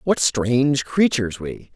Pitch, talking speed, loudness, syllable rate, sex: 125 Hz, 135 wpm, -19 LUFS, 4.2 syllables/s, male